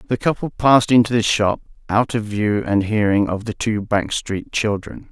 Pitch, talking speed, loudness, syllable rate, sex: 110 Hz, 200 wpm, -19 LUFS, 4.8 syllables/s, male